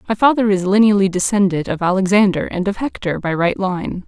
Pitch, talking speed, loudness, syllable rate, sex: 195 Hz, 190 wpm, -16 LUFS, 5.7 syllables/s, female